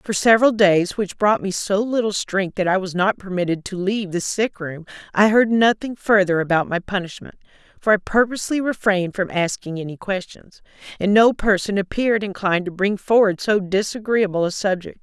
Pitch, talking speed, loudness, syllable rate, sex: 200 Hz, 185 wpm, -19 LUFS, 5.4 syllables/s, female